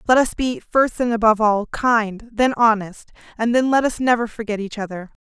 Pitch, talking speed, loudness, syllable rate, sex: 225 Hz, 205 wpm, -19 LUFS, 5.2 syllables/s, female